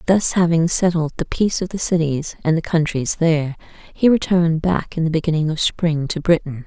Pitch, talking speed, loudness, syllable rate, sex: 165 Hz, 200 wpm, -19 LUFS, 5.4 syllables/s, female